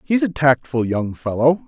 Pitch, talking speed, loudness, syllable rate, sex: 135 Hz, 180 wpm, -19 LUFS, 4.6 syllables/s, male